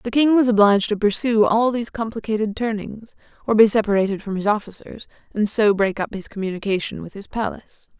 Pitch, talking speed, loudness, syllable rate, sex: 215 Hz, 190 wpm, -20 LUFS, 6.0 syllables/s, female